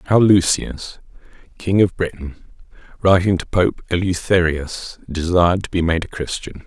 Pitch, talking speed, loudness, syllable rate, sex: 90 Hz, 135 wpm, -18 LUFS, 4.5 syllables/s, male